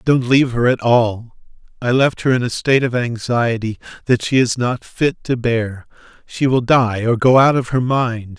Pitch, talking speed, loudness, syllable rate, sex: 120 Hz, 210 wpm, -16 LUFS, 4.6 syllables/s, male